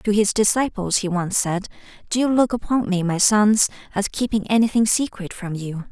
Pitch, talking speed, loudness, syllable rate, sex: 210 Hz, 195 wpm, -20 LUFS, 5.0 syllables/s, female